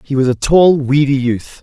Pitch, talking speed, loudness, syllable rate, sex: 140 Hz, 220 wpm, -13 LUFS, 4.6 syllables/s, male